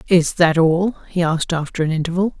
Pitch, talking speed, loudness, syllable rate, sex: 170 Hz, 200 wpm, -18 LUFS, 5.6 syllables/s, female